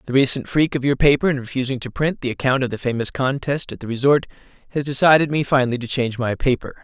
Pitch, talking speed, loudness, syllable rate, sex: 130 Hz, 235 wpm, -20 LUFS, 6.6 syllables/s, male